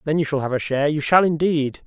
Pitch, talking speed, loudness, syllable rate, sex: 150 Hz, 290 wpm, -20 LUFS, 6.3 syllables/s, male